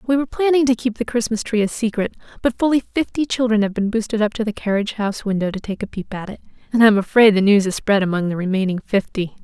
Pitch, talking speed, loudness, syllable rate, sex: 215 Hz, 260 wpm, -19 LUFS, 6.7 syllables/s, female